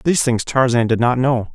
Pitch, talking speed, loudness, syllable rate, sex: 125 Hz, 235 wpm, -17 LUFS, 5.8 syllables/s, male